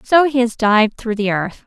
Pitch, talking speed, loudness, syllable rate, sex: 230 Hz, 250 wpm, -16 LUFS, 5.1 syllables/s, female